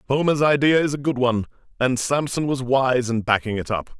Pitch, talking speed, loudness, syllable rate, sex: 130 Hz, 210 wpm, -21 LUFS, 5.5 syllables/s, male